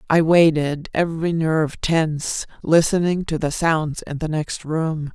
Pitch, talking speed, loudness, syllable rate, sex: 160 Hz, 150 wpm, -20 LUFS, 4.2 syllables/s, female